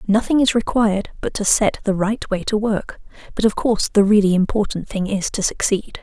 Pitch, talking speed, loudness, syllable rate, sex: 205 Hz, 210 wpm, -19 LUFS, 5.4 syllables/s, female